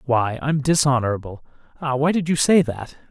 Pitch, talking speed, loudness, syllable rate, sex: 135 Hz, 175 wpm, -20 LUFS, 5.3 syllables/s, male